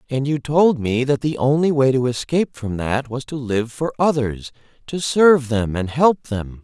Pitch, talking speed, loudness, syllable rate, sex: 130 Hz, 200 wpm, -19 LUFS, 4.6 syllables/s, male